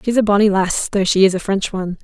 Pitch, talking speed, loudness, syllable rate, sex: 195 Hz, 295 wpm, -16 LUFS, 6.4 syllables/s, female